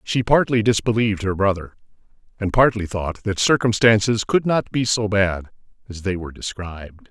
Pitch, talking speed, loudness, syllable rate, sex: 105 Hz, 160 wpm, -20 LUFS, 5.2 syllables/s, male